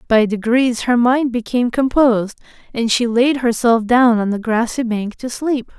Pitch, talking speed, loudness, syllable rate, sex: 240 Hz, 175 wpm, -16 LUFS, 4.6 syllables/s, female